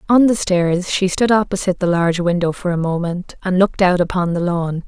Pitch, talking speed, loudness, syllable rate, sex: 180 Hz, 220 wpm, -17 LUFS, 5.6 syllables/s, female